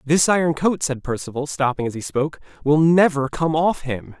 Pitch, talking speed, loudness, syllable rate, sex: 150 Hz, 200 wpm, -20 LUFS, 5.3 syllables/s, male